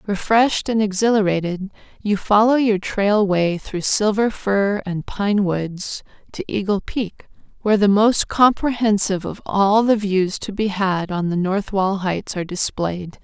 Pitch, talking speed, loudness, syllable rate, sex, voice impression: 200 Hz, 160 wpm, -19 LUFS, 4.2 syllables/s, female, very gender-neutral, slightly young, slightly adult-like, slightly relaxed, slightly weak, bright, soft, slightly clear, slightly fluent, cute, slightly cool, very intellectual, very refreshing, sincere, very calm, very friendly, very reassuring, slightly unique, elegant, sweet, slightly lively, very kind, slightly modest